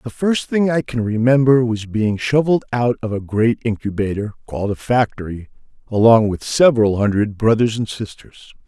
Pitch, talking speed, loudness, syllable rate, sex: 115 Hz, 165 wpm, -17 LUFS, 5.1 syllables/s, male